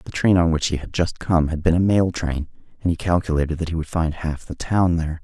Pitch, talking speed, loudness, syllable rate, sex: 85 Hz, 275 wpm, -21 LUFS, 5.9 syllables/s, male